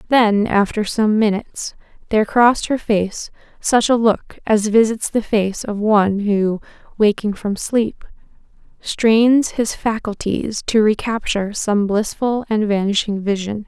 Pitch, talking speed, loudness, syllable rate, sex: 215 Hz, 135 wpm, -18 LUFS, 4.1 syllables/s, female